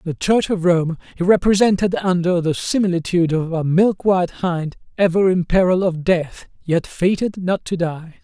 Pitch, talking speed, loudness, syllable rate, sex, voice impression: 180 Hz, 165 wpm, -18 LUFS, 4.8 syllables/s, male, very masculine, old, thick, slightly relaxed, powerful, slightly bright, soft, muffled, slightly fluent, raspy, slightly cool, intellectual, slightly refreshing, sincere, calm, slightly friendly, reassuring, unique, elegant, wild, lively, kind, slightly intense, slightly modest